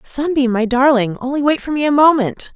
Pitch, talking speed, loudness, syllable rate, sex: 265 Hz, 190 wpm, -15 LUFS, 5.4 syllables/s, female